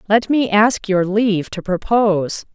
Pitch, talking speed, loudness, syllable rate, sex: 205 Hz, 165 wpm, -17 LUFS, 4.3 syllables/s, female